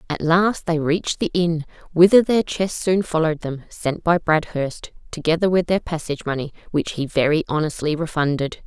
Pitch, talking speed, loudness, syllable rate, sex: 165 Hz, 175 wpm, -20 LUFS, 5.2 syllables/s, female